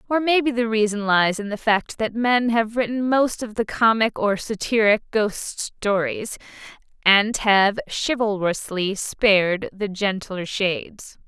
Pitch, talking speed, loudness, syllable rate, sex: 215 Hz, 145 wpm, -21 LUFS, 4.0 syllables/s, female